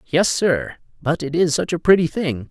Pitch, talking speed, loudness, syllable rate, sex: 155 Hz, 215 wpm, -19 LUFS, 4.7 syllables/s, male